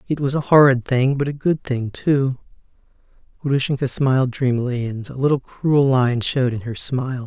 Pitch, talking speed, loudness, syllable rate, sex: 130 Hz, 180 wpm, -19 LUFS, 5.1 syllables/s, male